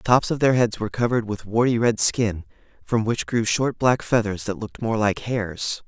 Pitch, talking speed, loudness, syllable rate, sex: 115 Hz, 225 wpm, -22 LUFS, 5.2 syllables/s, male